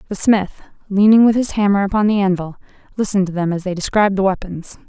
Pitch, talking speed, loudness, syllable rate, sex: 195 Hz, 210 wpm, -16 LUFS, 6.6 syllables/s, female